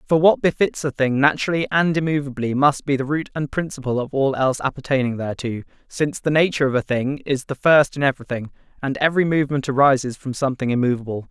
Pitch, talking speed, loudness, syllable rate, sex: 140 Hz, 195 wpm, -20 LUFS, 6.6 syllables/s, male